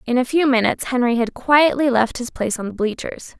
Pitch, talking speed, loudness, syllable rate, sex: 245 Hz, 230 wpm, -19 LUFS, 5.8 syllables/s, female